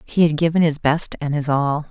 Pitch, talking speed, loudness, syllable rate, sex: 155 Hz, 250 wpm, -19 LUFS, 5.0 syllables/s, female